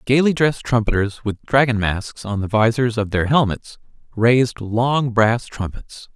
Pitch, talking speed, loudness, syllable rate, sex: 115 Hz, 155 wpm, -19 LUFS, 4.4 syllables/s, male